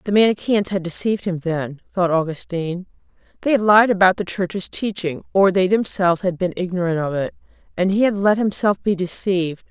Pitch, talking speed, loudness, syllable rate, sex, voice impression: 185 Hz, 185 wpm, -19 LUFS, 5.5 syllables/s, female, feminine, adult-like, tensed, powerful, slightly muffled, slightly raspy, intellectual, slightly calm, lively, strict, slightly intense, sharp